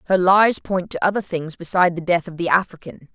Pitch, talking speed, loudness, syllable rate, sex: 180 Hz, 230 wpm, -19 LUFS, 5.9 syllables/s, female